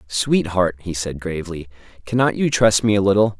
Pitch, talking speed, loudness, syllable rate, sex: 100 Hz, 175 wpm, -19 LUFS, 5.3 syllables/s, male